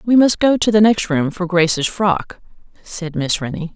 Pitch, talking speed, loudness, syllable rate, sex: 185 Hz, 210 wpm, -16 LUFS, 4.6 syllables/s, female